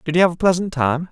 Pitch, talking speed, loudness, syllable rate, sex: 165 Hz, 325 wpm, -18 LUFS, 6.9 syllables/s, male